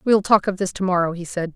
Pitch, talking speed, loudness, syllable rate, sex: 185 Hz, 310 wpm, -20 LUFS, 6.2 syllables/s, female